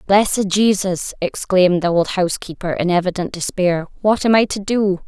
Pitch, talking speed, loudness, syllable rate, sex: 190 Hz, 165 wpm, -18 LUFS, 5.1 syllables/s, female